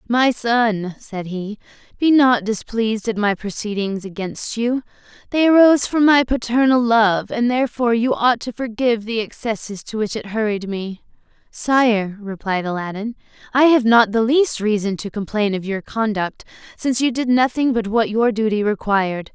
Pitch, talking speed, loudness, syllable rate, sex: 225 Hz, 170 wpm, -19 LUFS, 4.8 syllables/s, female